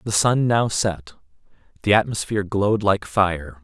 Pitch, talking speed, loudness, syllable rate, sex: 100 Hz, 150 wpm, -20 LUFS, 4.6 syllables/s, male